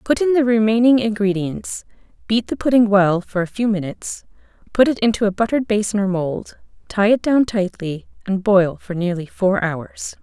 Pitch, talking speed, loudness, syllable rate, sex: 205 Hz, 180 wpm, -18 LUFS, 5.0 syllables/s, female